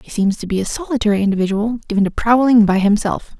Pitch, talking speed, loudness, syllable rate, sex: 215 Hz, 210 wpm, -16 LUFS, 6.6 syllables/s, female